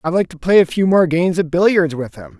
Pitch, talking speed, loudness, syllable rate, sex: 170 Hz, 300 wpm, -15 LUFS, 6.1 syllables/s, male